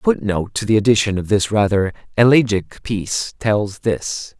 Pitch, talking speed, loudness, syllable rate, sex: 105 Hz, 165 wpm, -18 LUFS, 4.9 syllables/s, male